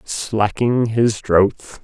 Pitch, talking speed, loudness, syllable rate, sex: 110 Hz, 100 wpm, -18 LUFS, 2.3 syllables/s, male